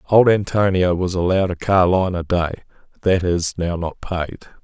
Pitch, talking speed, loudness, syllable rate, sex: 90 Hz, 170 wpm, -19 LUFS, 5.4 syllables/s, male